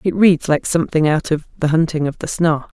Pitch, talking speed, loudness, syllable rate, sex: 160 Hz, 235 wpm, -17 LUFS, 5.5 syllables/s, female